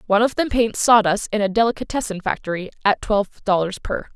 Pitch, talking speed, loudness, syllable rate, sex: 210 Hz, 190 wpm, -20 LUFS, 6.1 syllables/s, female